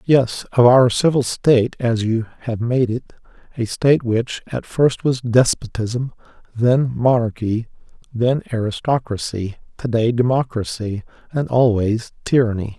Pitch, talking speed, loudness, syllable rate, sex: 120 Hz, 120 wpm, -19 LUFS, 4.2 syllables/s, male